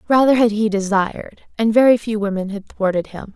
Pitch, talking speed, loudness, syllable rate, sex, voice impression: 210 Hz, 195 wpm, -17 LUFS, 5.7 syllables/s, female, feminine, slightly young, tensed, slightly dark, clear, fluent, calm, slightly friendly, lively, kind, modest